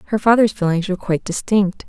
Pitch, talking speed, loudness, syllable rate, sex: 200 Hz, 190 wpm, -18 LUFS, 6.8 syllables/s, female